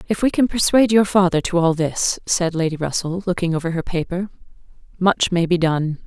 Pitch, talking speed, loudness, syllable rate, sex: 175 Hz, 200 wpm, -19 LUFS, 5.4 syllables/s, female